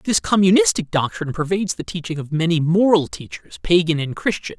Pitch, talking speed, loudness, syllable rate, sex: 165 Hz, 170 wpm, -19 LUFS, 5.9 syllables/s, male